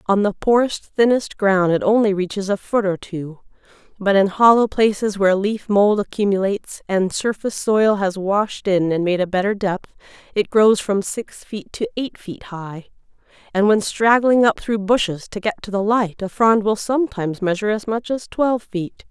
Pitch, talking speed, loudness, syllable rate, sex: 205 Hz, 190 wpm, -19 LUFS, 4.9 syllables/s, female